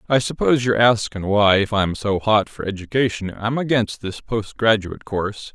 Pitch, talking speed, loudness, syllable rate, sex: 105 Hz, 175 wpm, -20 LUFS, 5.2 syllables/s, male